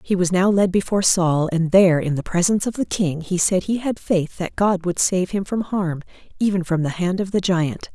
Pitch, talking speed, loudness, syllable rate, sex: 185 Hz, 250 wpm, -20 LUFS, 5.2 syllables/s, female